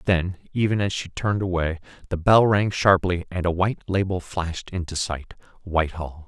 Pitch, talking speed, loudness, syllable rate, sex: 90 Hz, 160 wpm, -23 LUFS, 5.4 syllables/s, male